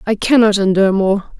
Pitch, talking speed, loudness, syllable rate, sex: 205 Hz, 170 wpm, -13 LUFS, 5.7 syllables/s, female